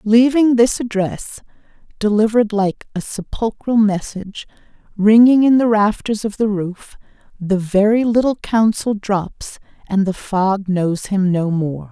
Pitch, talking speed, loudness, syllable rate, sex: 210 Hz, 135 wpm, -16 LUFS, 3.7 syllables/s, female